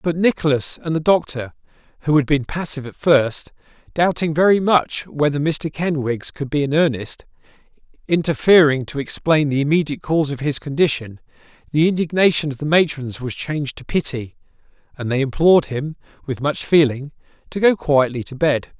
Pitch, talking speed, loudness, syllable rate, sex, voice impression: 150 Hz, 155 wpm, -19 LUFS, 5.3 syllables/s, male, very masculine, very adult-like, slightly old, thick, tensed, powerful, bright, hard, slightly clear, fluent, cool, intellectual, slightly refreshing, sincere, very calm, slightly mature, friendly, very reassuring, unique, slightly elegant, wild, slightly sweet, lively, kind, slightly intense